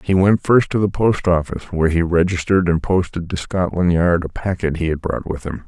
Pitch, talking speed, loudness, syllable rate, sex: 90 Hz, 230 wpm, -18 LUFS, 5.7 syllables/s, male